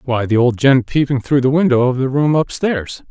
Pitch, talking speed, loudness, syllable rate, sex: 135 Hz, 230 wpm, -15 LUFS, 5.1 syllables/s, male